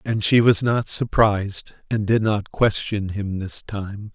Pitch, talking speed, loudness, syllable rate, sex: 105 Hz, 175 wpm, -21 LUFS, 3.8 syllables/s, male